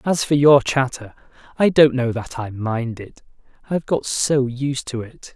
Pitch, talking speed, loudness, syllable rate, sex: 130 Hz, 180 wpm, -19 LUFS, 4.4 syllables/s, male